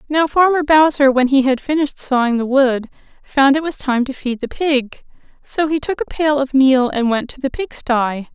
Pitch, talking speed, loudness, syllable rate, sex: 275 Hz, 215 wpm, -16 LUFS, 5.0 syllables/s, female